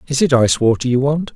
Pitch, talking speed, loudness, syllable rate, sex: 135 Hz, 265 wpm, -15 LUFS, 6.7 syllables/s, male